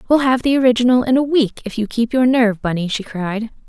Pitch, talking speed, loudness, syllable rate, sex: 235 Hz, 245 wpm, -17 LUFS, 6.0 syllables/s, female